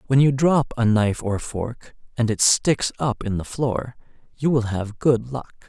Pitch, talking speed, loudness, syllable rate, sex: 120 Hz, 200 wpm, -21 LUFS, 4.3 syllables/s, male